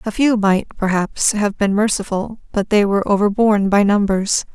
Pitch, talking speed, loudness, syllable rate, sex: 205 Hz, 170 wpm, -17 LUFS, 5.1 syllables/s, female